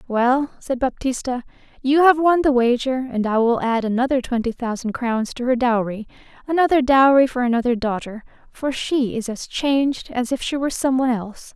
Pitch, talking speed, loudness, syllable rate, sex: 250 Hz, 170 wpm, -20 LUFS, 5.3 syllables/s, female